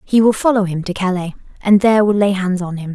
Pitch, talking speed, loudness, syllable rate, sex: 195 Hz, 265 wpm, -16 LUFS, 6.1 syllables/s, female